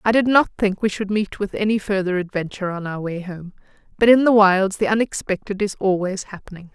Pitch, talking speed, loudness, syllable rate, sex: 200 Hz, 215 wpm, -20 LUFS, 5.7 syllables/s, female